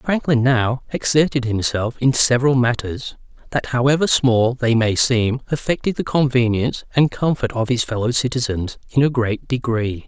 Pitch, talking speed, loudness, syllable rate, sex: 125 Hz, 155 wpm, -18 LUFS, 4.8 syllables/s, male